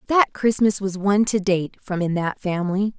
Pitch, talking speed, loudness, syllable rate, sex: 195 Hz, 200 wpm, -21 LUFS, 5.2 syllables/s, female